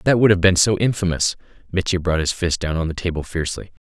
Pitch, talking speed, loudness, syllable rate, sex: 90 Hz, 250 wpm, -19 LUFS, 6.6 syllables/s, male